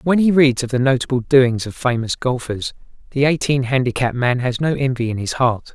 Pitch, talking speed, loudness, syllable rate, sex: 130 Hz, 210 wpm, -18 LUFS, 5.3 syllables/s, male